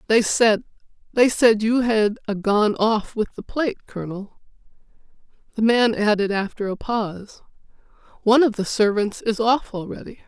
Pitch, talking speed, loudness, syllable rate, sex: 220 Hz, 130 wpm, -21 LUFS, 4.9 syllables/s, female